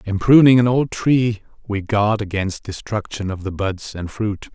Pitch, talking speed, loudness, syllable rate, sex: 105 Hz, 185 wpm, -19 LUFS, 4.3 syllables/s, male